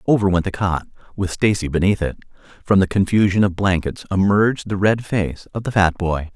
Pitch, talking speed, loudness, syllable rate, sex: 95 Hz, 200 wpm, -19 LUFS, 5.5 syllables/s, male